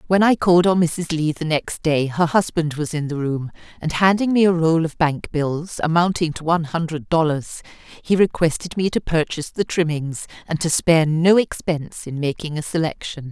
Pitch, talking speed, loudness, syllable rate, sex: 160 Hz, 200 wpm, -20 LUFS, 5.1 syllables/s, female